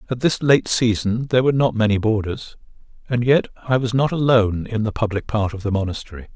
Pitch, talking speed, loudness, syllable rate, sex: 115 Hz, 210 wpm, -19 LUFS, 6.2 syllables/s, male